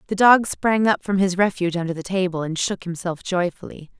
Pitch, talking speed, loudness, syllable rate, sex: 185 Hz, 210 wpm, -21 LUFS, 5.6 syllables/s, female